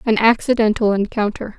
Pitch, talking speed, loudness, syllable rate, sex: 220 Hz, 115 wpm, -17 LUFS, 5.4 syllables/s, female